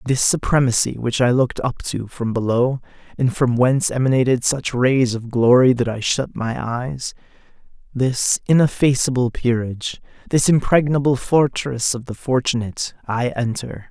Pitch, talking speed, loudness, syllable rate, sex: 125 Hz, 140 wpm, -19 LUFS, 4.8 syllables/s, male